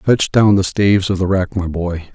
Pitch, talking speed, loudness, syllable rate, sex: 95 Hz, 250 wpm, -15 LUFS, 4.8 syllables/s, male